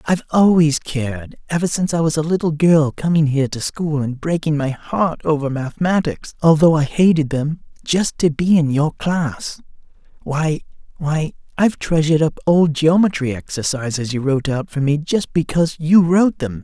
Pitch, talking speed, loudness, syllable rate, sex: 155 Hz, 160 wpm, -18 LUFS, 5.1 syllables/s, male